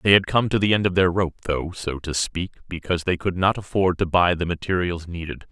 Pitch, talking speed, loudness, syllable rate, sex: 90 Hz, 250 wpm, -22 LUFS, 5.7 syllables/s, male